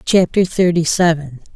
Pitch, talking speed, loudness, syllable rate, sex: 170 Hz, 115 wpm, -15 LUFS, 4.4 syllables/s, female